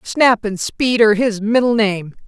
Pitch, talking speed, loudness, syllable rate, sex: 220 Hz, 185 wpm, -15 LUFS, 4.3 syllables/s, female